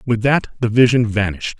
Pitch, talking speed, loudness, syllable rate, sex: 115 Hz, 190 wpm, -16 LUFS, 6.1 syllables/s, male